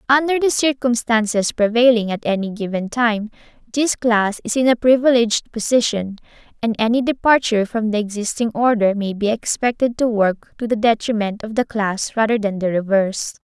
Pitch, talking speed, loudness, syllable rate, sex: 225 Hz, 165 wpm, -18 LUFS, 5.3 syllables/s, female